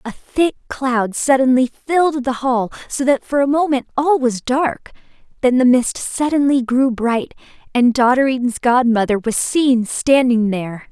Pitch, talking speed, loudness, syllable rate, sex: 255 Hz, 155 wpm, -16 LUFS, 4.3 syllables/s, female